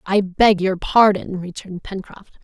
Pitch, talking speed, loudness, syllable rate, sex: 195 Hz, 150 wpm, -17 LUFS, 4.5 syllables/s, female